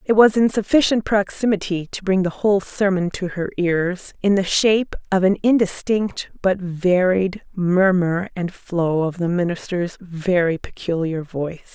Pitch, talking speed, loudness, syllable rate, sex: 185 Hz, 155 wpm, -20 LUFS, 4.4 syllables/s, female